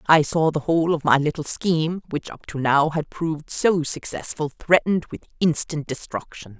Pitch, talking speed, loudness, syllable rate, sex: 155 Hz, 180 wpm, -22 LUFS, 5.0 syllables/s, female